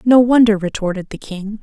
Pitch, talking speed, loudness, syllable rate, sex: 215 Hz, 185 wpm, -14 LUFS, 5.2 syllables/s, female